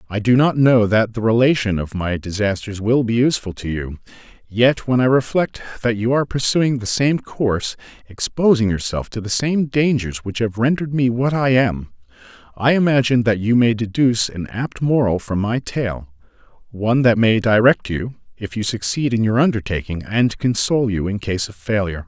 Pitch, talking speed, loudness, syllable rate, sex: 115 Hz, 190 wpm, -18 LUFS, 5.2 syllables/s, male